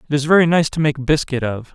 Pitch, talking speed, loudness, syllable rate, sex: 145 Hz, 275 wpm, -17 LUFS, 6.4 syllables/s, male